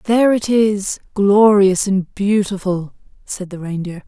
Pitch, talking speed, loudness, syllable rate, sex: 200 Hz, 135 wpm, -16 LUFS, 4.0 syllables/s, female